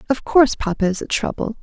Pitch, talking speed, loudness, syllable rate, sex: 235 Hz, 220 wpm, -19 LUFS, 6.3 syllables/s, female